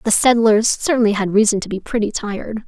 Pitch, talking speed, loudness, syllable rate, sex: 215 Hz, 200 wpm, -17 LUFS, 5.9 syllables/s, female